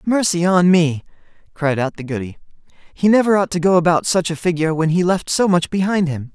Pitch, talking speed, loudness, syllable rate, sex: 170 Hz, 215 wpm, -17 LUFS, 5.8 syllables/s, male